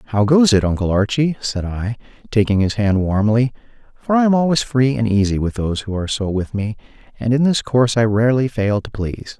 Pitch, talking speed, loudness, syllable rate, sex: 115 Hz, 215 wpm, -18 LUFS, 2.1 syllables/s, male